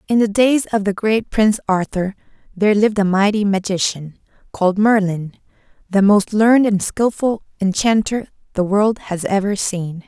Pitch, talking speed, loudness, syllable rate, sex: 205 Hz, 155 wpm, -17 LUFS, 4.9 syllables/s, female